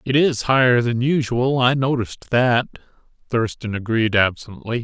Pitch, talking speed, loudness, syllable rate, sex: 120 Hz, 135 wpm, -19 LUFS, 4.5 syllables/s, male